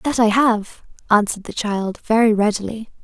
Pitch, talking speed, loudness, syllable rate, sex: 215 Hz, 160 wpm, -18 LUFS, 5.0 syllables/s, female